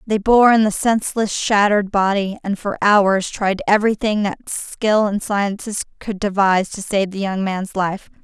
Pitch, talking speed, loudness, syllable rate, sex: 200 Hz, 175 wpm, -18 LUFS, 4.6 syllables/s, female